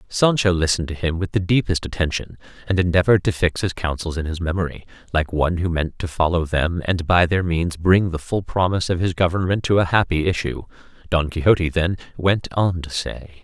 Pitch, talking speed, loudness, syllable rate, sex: 85 Hz, 205 wpm, -20 LUFS, 5.7 syllables/s, male